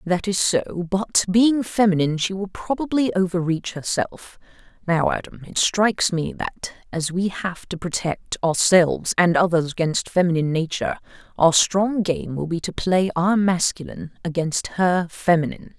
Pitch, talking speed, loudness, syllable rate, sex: 180 Hz, 150 wpm, -21 LUFS, 4.7 syllables/s, female